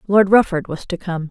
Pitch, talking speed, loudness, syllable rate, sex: 185 Hz, 230 wpm, -17 LUFS, 5.2 syllables/s, female